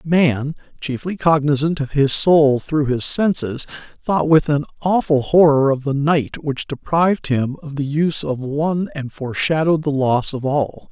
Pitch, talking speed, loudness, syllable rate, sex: 145 Hz, 170 wpm, -18 LUFS, 4.5 syllables/s, male